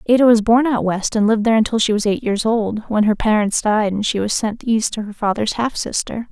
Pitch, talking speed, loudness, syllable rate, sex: 220 Hz, 265 wpm, -17 LUFS, 5.7 syllables/s, female